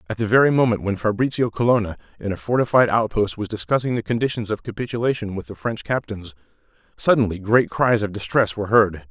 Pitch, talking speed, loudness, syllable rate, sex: 110 Hz, 185 wpm, -21 LUFS, 6.2 syllables/s, male